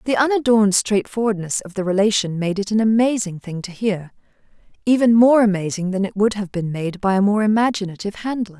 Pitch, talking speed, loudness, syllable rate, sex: 205 Hz, 190 wpm, -19 LUFS, 6.0 syllables/s, female